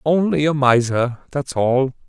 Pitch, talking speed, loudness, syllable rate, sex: 140 Hz, 145 wpm, -18 LUFS, 4.0 syllables/s, male